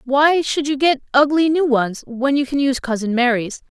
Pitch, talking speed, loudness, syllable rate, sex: 270 Hz, 205 wpm, -17 LUFS, 5.0 syllables/s, female